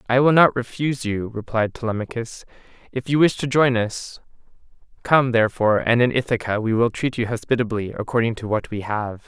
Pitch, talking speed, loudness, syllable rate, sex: 120 Hz, 180 wpm, -21 LUFS, 5.7 syllables/s, male